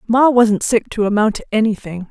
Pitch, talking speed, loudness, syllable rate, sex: 220 Hz, 200 wpm, -16 LUFS, 5.4 syllables/s, female